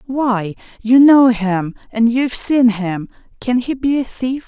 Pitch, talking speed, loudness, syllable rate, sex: 240 Hz, 175 wpm, -15 LUFS, 3.9 syllables/s, female